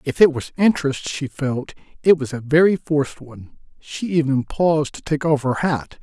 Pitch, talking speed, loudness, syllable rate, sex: 145 Hz, 200 wpm, -20 LUFS, 5.1 syllables/s, male